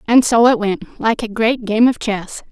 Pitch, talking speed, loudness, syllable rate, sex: 225 Hz, 240 wpm, -16 LUFS, 4.4 syllables/s, female